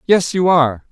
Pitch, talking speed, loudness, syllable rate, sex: 160 Hz, 195 wpm, -15 LUFS, 5.4 syllables/s, male